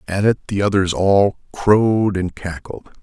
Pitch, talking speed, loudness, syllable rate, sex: 100 Hz, 160 wpm, -17 LUFS, 4.3 syllables/s, male